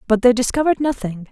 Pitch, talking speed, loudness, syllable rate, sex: 245 Hz, 180 wpm, -18 LUFS, 7.0 syllables/s, female